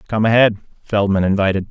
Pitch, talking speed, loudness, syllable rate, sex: 100 Hz, 140 wpm, -16 LUFS, 6.1 syllables/s, male